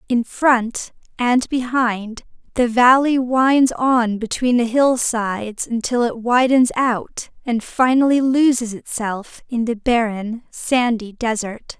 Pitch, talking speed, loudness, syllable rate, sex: 240 Hz, 125 wpm, -18 LUFS, 3.5 syllables/s, female